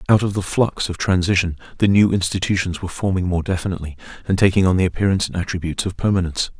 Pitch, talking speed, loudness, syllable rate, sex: 90 Hz, 200 wpm, -19 LUFS, 7.4 syllables/s, male